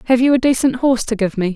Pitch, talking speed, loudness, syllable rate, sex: 240 Hz, 310 wpm, -16 LUFS, 7.3 syllables/s, female